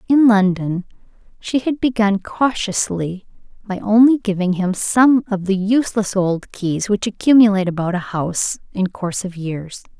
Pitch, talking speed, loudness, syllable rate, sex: 200 Hz, 150 wpm, -18 LUFS, 4.7 syllables/s, female